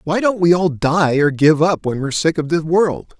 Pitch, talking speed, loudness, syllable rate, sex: 160 Hz, 265 wpm, -16 LUFS, 4.9 syllables/s, male